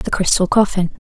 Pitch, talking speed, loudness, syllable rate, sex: 185 Hz, 170 wpm, -16 LUFS, 5.5 syllables/s, female